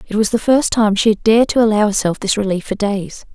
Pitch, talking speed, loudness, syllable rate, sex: 210 Hz, 270 wpm, -15 LUFS, 6.0 syllables/s, female